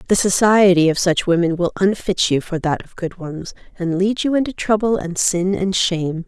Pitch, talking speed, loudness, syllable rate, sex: 185 Hz, 210 wpm, -18 LUFS, 5.0 syllables/s, female